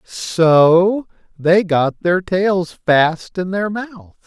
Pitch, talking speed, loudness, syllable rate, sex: 180 Hz, 125 wpm, -16 LUFS, 2.4 syllables/s, male